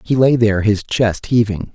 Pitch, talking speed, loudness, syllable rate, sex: 110 Hz, 205 wpm, -16 LUFS, 4.9 syllables/s, male